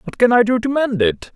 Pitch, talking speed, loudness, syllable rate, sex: 220 Hz, 310 wpm, -16 LUFS, 5.7 syllables/s, male